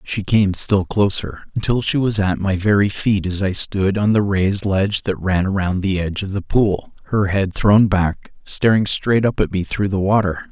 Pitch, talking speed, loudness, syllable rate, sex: 100 Hz, 215 wpm, -18 LUFS, 4.7 syllables/s, male